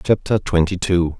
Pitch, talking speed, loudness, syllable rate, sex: 90 Hz, 150 wpm, -18 LUFS, 4.6 syllables/s, male